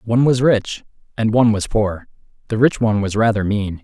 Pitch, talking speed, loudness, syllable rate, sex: 110 Hz, 205 wpm, -17 LUFS, 5.7 syllables/s, male